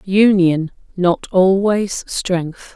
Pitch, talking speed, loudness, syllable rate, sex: 185 Hz, 85 wpm, -16 LUFS, 2.6 syllables/s, female